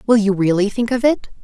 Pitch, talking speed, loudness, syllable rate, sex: 215 Hz, 250 wpm, -17 LUFS, 5.8 syllables/s, female